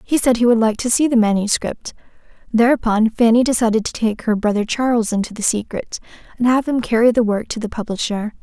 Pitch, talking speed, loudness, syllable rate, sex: 225 Hz, 205 wpm, -17 LUFS, 5.9 syllables/s, female